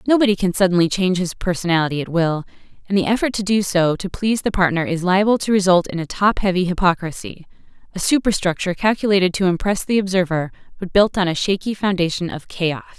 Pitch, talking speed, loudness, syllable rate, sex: 185 Hz, 185 wpm, -19 LUFS, 6.3 syllables/s, female